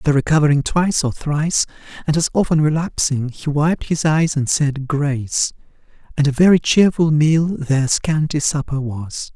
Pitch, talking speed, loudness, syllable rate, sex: 150 Hz, 160 wpm, -17 LUFS, 4.7 syllables/s, male